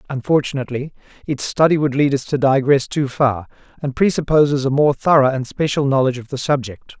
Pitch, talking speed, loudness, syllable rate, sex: 140 Hz, 180 wpm, -18 LUFS, 5.9 syllables/s, male